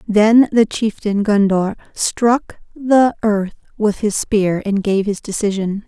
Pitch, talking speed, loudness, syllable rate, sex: 210 Hz, 145 wpm, -16 LUFS, 3.5 syllables/s, female